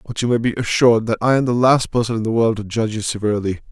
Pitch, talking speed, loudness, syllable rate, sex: 115 Hz, 290 wpm, -18 LUFS, 7.3 syllables/s, male